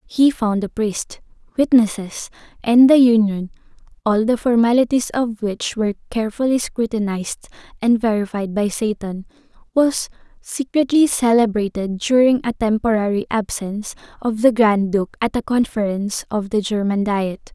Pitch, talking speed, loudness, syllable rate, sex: 220 Hz, 125 wpm, -18 LUFS, 4.2 syllables/s, female